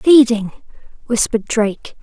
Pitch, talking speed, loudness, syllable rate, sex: 235 Hz, 90 wpm, -16 LUFS, 4.6 syllables/s, female